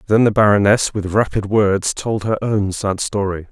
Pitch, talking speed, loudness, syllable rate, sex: 105 Hz, 190 wpm, -17 LUFS, 4.6 syllables/s, male